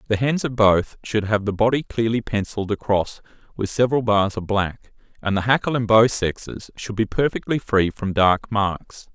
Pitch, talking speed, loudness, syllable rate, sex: 110 Hz, 190 wpm, -21 LUFS, 4.9 syllables/s, male